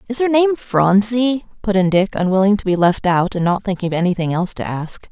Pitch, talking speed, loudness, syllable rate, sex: 200 Hz, 235 wpm, -17 LUFS, 5.7 syllables/s, female